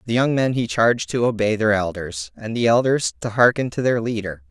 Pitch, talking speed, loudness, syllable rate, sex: 110 Hz, 225 wpm, -20 LUFS, 5.5 syllables/s, male